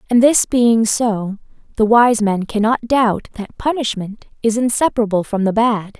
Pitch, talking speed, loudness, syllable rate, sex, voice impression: 225 Hz, 160 wpm, -16 LUFS, 4.5 syllables/s, female, very feminine, young, very thin, tensed, slightly weak, bright, slightly soft, clear, fluent, very cute, slightly intellectual, very refreshing, sincere, calm, very friendly, very reassuring, unique, elegant, sweet, lively, kind, slightly modest